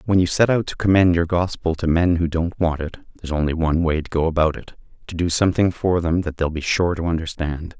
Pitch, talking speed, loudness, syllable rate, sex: 85 Hz, 245 wpm, -20 LUFS, 6.0 syllables/s, male